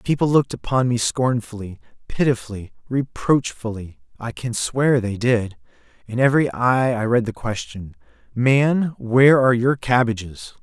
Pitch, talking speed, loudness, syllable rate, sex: 120 Hz, 135 wpm, -20 LUFS, 4.5 syllables/s, male